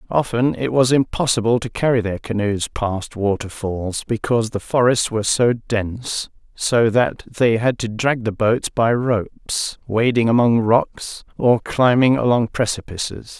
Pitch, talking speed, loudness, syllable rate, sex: 115 Hz, 150 wpm, -19 LUFS, 4.3 syllables/s, male